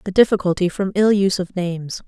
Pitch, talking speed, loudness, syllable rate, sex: 190 Hz, 205 wpm, -19 LUFS, 6.4 syllables/s, female